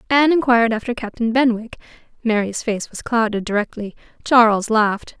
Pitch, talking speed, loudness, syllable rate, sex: 230 Hz, 140 wpm, -18 LUFS, 5.7 syllables/s, female